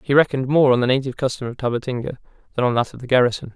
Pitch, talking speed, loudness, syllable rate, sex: 130 Hz, 255 wpm, -20 LUFS, 8.1 syllables/s, male